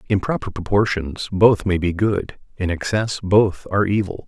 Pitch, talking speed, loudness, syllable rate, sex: 95 Hz, 170 wpm, -20 LUFS, 4.8 syllables/s, male